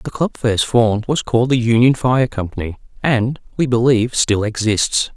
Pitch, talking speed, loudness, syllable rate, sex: 120 Hz, 175 wpm, -17 LUFS, 5.0 syllables/s, male